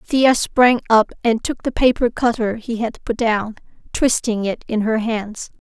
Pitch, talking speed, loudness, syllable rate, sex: 230 Hz, 180 wpm, -18 LUFS, 4.2 syllables/s, female